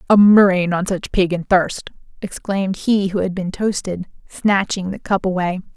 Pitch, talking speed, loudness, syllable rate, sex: 190 Hz, 165 wpm, -18 LUFS, 4.7 syllables/s, female